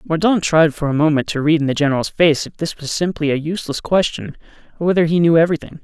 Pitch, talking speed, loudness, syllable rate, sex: 160 Hz, 235 wpm, -17 LUFS, 6.6 syllables/s, male